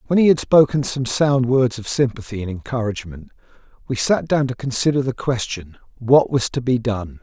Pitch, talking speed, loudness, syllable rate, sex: 125 Hz, 190 wpm, -19 LUFS, 5.3 syllables/s, male